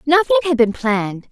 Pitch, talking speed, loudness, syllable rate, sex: 245 Hz, 185 wpm, -16 LUFS, 5.9 syllables/s, female